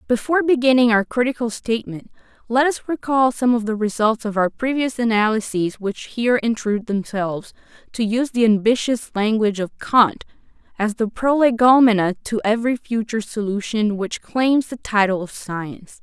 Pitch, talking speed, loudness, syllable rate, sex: 225 Hz, 150 wpm, -19 LUFS, 5.3 syllables/s, female